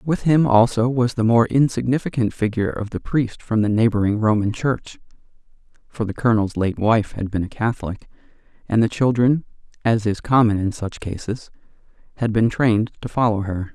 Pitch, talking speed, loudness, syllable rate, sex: 110 Hz, 175 wpm, -20 LUFS, 5.3 syllables/s, male